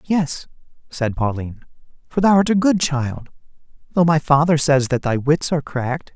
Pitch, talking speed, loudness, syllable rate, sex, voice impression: 145 Hz, 175 wpm, -19 LUFS, 5.0 syllables/s, male, masculine, adult-like, tensed, slightly weak, soft, slightly muffled, intellectual, calm, friendly, reassuring, wild, kind, modest